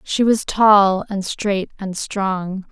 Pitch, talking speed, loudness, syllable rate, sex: 200 Hz, 155 wpm, -18 LUFS, 2.8 syllables/s, female